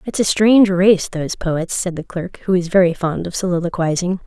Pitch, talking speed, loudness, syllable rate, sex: 180 Hz, 210 wpm, -17 LUFS, 5.5 syllables/s, female